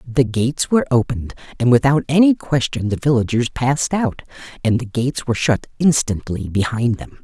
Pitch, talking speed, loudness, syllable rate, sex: 125 Hz, 165 wpm, -18 LUFS, 5.6 syllables/s, male